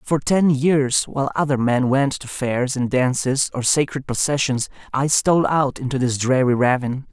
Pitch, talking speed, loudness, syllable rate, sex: 135 Hz, 175 wpm, -19 LUFS, 4.8 syllables/s, male